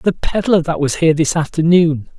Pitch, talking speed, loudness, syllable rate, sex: 165 Hz, 190 wpm, -15 LUFS, 5.3 syllables/s, male